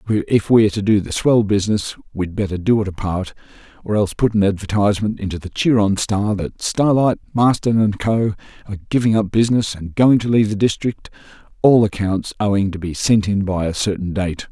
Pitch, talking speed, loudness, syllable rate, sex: 105 Hz, 195 wpm, -18 LUFS, 5.6 syllables/s, male